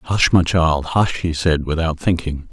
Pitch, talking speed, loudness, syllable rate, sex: 80 Hz, 190 wpm, -18 LUFS, 4.1 syllables/s, male